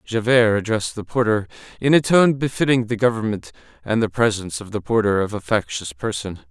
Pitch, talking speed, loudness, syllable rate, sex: 115 Hz, 185 wpm, -20 LUFS, 5.8 syllables/s, male